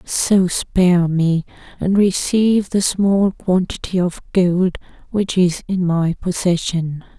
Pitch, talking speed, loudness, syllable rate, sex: 180 Hz, 125 wpm, -17 LUFS, 3.6 syllables/s, female